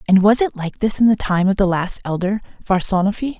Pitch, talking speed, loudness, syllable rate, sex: 200 Hz, 230 wpm, -18 LUFS, 5.7 syllables/s, female